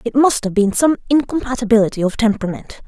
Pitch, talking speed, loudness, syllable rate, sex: 230 Hz, 165 wpm, -16 LUFS, 6.4 syllables/s, female